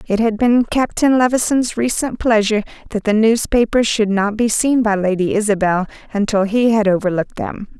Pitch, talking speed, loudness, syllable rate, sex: 220 Hz, 175 wpm, -16 LUFS, 5.3 syllables/s, female